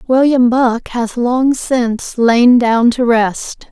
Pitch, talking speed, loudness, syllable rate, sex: 240 Hz, 145 wpm, -13 LUFS, 3.1 syllables/s, female